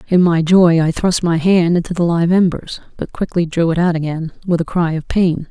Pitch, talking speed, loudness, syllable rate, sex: 170 Hz, 240 wpm, -15 LUFS, 5.1 syllables/s, female